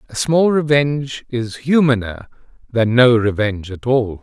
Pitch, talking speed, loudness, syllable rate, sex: 125 Hz, 140 wpm, -16 LUFS, 4.4 syllables/s, male